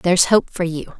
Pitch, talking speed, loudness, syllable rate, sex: 175 Hz, 240 wpm, -18 LUFS, 5.4 syllables/s, female